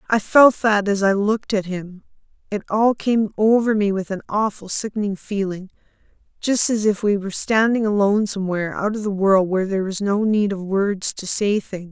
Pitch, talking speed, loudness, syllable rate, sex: 205 Hz, 190 wpm, -20 LUFS, 5.3 syllables/s, female